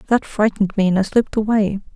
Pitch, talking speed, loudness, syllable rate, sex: 205 Hz, 215 wpm, -18 LUFS, 7.0 syllables/s, female